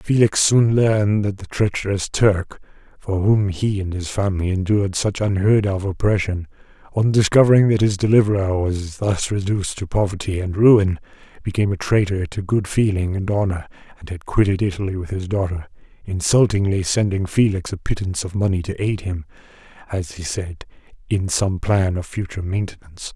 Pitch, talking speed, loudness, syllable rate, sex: 95 Hz, 165 wpm, -20 LUFS, 5.3 syllables/s, male